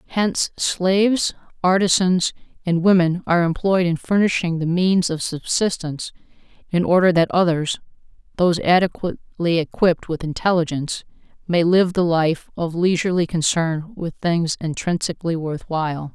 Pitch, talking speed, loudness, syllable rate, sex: 175 Hz, 125 wpm, -20 LUFS, 5.0 syllables/s, female